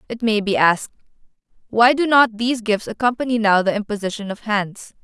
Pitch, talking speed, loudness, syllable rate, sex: 220 Hz, 180 wpm, -18 LUFS, 5.8 syllables/s, female